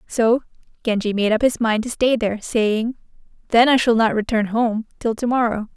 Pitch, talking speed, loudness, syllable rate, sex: 225 Hz, 200 wpm, -19 LUFS, 5.1 syllables/s, female